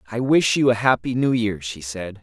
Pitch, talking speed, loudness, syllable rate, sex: 115 Hz, 240 wpm, -20 LUFS, 5.0 syllables/s, male